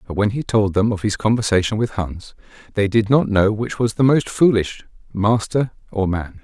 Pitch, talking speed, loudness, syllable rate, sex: 105 Hz, 205 wpm, -19 LUFS, 5.0 syllables/s, male